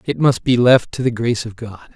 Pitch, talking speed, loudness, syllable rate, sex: 120 Hz, 275 wpm, -16 LUFS, 5.5 syllables/s, male